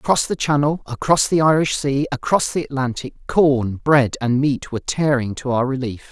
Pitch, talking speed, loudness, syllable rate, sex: 135 Hz, 185 wpm, -19 LUFS, 5.0 syllables/s, male